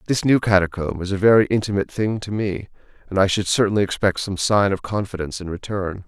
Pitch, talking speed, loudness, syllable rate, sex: 100 Hz, 205 wpm, -20 LUFS, 6.2 syllables/s, male